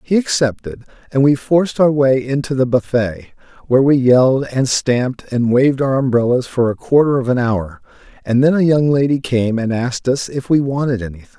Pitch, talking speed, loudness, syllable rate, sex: 130 Hz, 200 wpm, -15 LUFS, 5.4 syllables/s, male